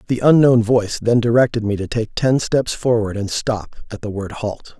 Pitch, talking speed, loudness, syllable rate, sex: 115 Hz, 215 wpm, -18 LUFS, 5.0 syllables/s, male